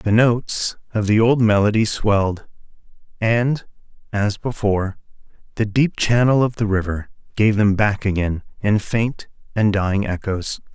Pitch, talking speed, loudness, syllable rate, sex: 105 Hz, 140 wpm, -19 LUFS, 4.5 syllables/s, male